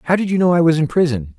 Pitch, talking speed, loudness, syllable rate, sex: 165 Hz, 345 wpm, -16 LUFS, 7.4 syllables/s, male